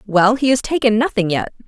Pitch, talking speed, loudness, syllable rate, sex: 225 Hz, 215 wpm, -16 LUFS, 5.6 syllables/s, female